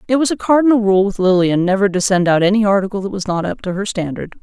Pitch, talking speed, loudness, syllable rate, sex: 200 Hz, 270 wpm, -15 LUFS, 6.7 syllables/s, female